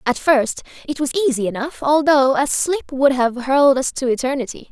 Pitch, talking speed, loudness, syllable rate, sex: 275 Hz, 190 wpm, -18 LUFS, 5.3 syllables/s, female